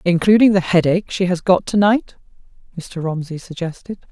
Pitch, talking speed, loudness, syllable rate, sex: 185 Hz, 160 wpm, -17 LUFS, 5.3 syllables/s, female